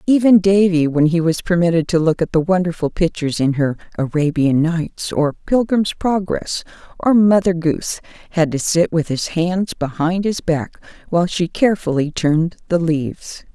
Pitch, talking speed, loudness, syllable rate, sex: 170 Hz, 165 wpm, -17 LUFS, 4.9 syllables/s, female